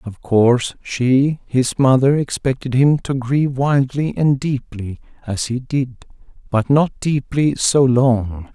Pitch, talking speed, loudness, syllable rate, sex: 130 Hz, 140 wpm, -17 LUFS, 3.7 syllables/s, male